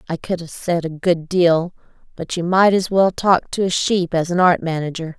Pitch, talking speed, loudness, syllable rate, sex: 175 Hz, 230 wpm, -18 LUFS, 4.8 syllables/s, female